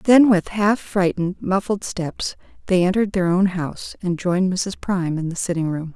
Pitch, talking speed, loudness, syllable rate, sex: 185 Hz, 190 wpm, -21 LUFS, 5.2 syllables/s, female